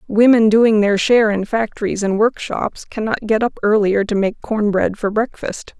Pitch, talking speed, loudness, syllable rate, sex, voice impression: 215 Hz, 185 wpm, -17 LUFS, 4.7 syllables/s, female, feminine, adult-like, slightly relaxed, powerful, slightly bright, fluent, raspy, intellectual, unique, lively, slightly light